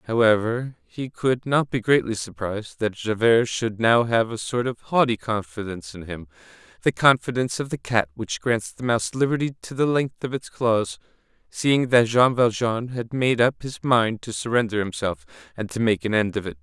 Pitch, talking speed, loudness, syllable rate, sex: 115 Hz, 195 wpm, -23 LUFS, 5.0 syllables/s, male